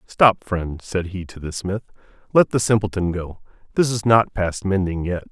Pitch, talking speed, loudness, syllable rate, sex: 95 Hz, 190 wpm, -21 LUFS, 4.7 syllables/s, male